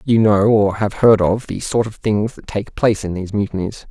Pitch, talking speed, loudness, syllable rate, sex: 105 Hz, 245 wpm, -17 LUFS, 5.3 syllables/s, male